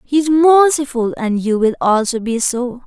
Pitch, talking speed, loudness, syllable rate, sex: 255 Hz, 190 wpm, -15 LUFS, 4.4 syllables/s, female